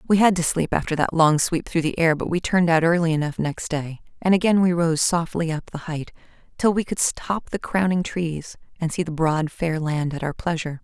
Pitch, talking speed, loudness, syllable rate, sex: 165 Hz, 240 wpm, -22 LUFS, 5.3 syllables/s, female